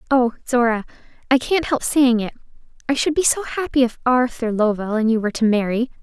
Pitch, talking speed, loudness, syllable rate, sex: 245 Hz, 200 wpm, -19 LUFS, 6.0 syllables/s, female